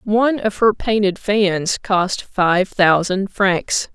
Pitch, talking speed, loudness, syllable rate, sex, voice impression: 195 Hz, 135 wpm, -17 LUFS, 3.2 syllables/s, female, feminine, adult-like, tensed, powerful, clear, intellectual, calm, reassuring, elegant, lively, slightly intense